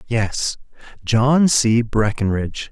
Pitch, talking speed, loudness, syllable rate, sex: 115 Hz, 90 wpm, -18 LUFS, 3.3 syllables/s, male